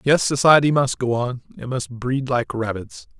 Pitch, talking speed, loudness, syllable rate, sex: 130 Hz, 190 wpm, -20 LUFS, 4.6 syllables/s, male